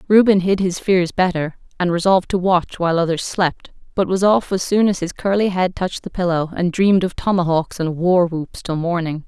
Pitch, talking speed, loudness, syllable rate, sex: 180 Hz, 215 wpm, -18 LUFS, 5.3 syllables/s, female